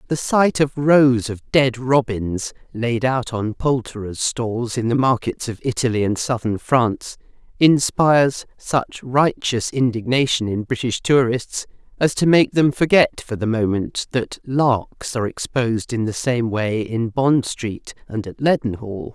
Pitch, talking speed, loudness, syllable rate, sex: 125 Hz, 155 wpm, -19 LUFS, 4.1 syllables/s, female